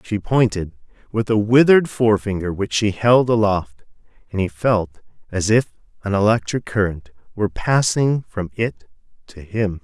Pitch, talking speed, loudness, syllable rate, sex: 105 Hz, 145 wpm, -19 LUFS, 4.7 syllables/s, male